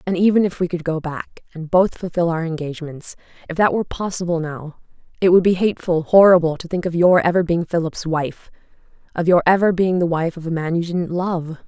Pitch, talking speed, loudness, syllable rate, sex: 170 Hz, 200 wpm, -18 LUFS, 5.7 syllables/s, female